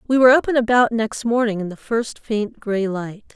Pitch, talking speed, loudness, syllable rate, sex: 225 Hz, 235 wpm, -19 LUFS, 5.1 syllables/s, female